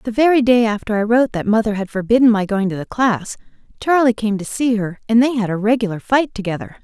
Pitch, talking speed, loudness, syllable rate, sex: 225 Hz, 235 wpm, -17 LUFS, 6.2 syllables/s, female